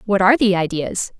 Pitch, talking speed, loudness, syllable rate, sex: 200 Hz, 200 wpm, -17 LUFS, 5.9 syllables/s, female